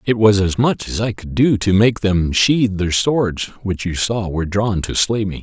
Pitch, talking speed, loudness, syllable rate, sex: 100 Hz, 245 wpm, -17 LUFS, 4.3 syllables/s, male